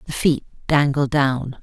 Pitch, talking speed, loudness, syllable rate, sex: 140 Hz, 150 wpm, -20 LUFS, 4.1 syllables/s, female